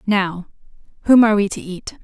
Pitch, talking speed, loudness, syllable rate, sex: 205 Hz, 175 wpm, -16 LUFS, 5.3 syllables/s, female